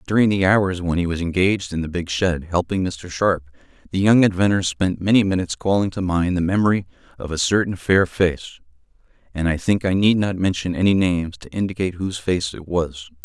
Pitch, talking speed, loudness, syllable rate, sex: 90 Hz, 205 wpm, -20 LUFS, 5.8 syllables/s, male